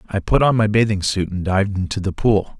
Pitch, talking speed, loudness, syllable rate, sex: 100 Hz, 255 wpm, -18 LUFS, 6.0 syllables/s, male